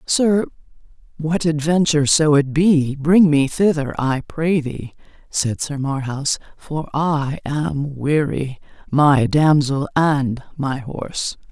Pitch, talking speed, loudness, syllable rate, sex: 150 Hz, 125 wpm, -19 LUFS, 3.6 syllables/s, female